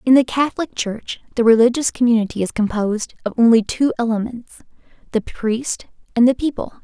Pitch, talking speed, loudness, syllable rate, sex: 235 Hz, 160 wpm, -18 LUFS, 5.7 syllables/s, female